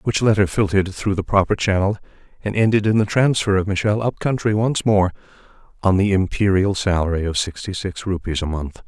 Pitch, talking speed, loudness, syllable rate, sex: 100 Hz, 190 wpm, -19 LUFS, 5.8 syllables/s, male